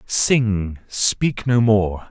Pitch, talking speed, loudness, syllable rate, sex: 105 Hz, 115 wpm, -18 LUFS, 2.1 syllables/s, male